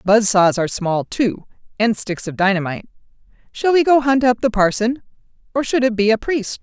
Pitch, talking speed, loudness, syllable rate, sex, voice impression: 220 Hz, 190 wpm, -17 LUFS, 5.3 syllables/s, female, feminine, adult-like, tensed, powerful, slightly bright, clear, fluent, slightly raspy, slightly friendly, slightly unique, lively, intense